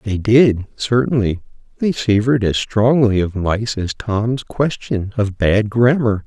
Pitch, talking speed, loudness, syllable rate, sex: 110 Hz, 145 wpm, -17 LUFS, 3.9 syllables/s, male